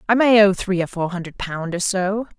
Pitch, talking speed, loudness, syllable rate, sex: 195 Hz, 250 wpm, -19 LUFS, 5.2 syllables/s, female